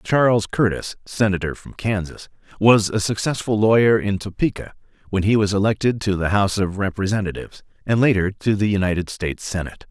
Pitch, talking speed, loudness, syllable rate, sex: 100 Hz, 165 wpm, -20 LUFS, 5.8 syllables/s, male